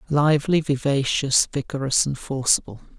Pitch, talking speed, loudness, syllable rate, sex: 140 Hz, 100 wpm, -21 LUFS, 5.0 syllables/s, male